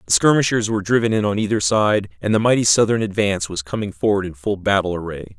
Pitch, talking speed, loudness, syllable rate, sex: 100 Hz, 225 wpm, -19 LUFS, 6.4 syllables/s, male